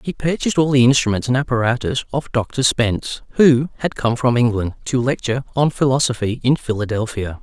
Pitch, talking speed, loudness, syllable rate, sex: 125 Hz, 170 wpm, -18 LUFS, 5.6 syllables/s, male